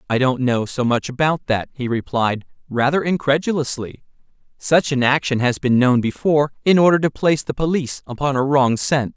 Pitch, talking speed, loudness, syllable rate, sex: 135 Hz, 185 wpm, -19 LUFS, 5.4 syllables/s, male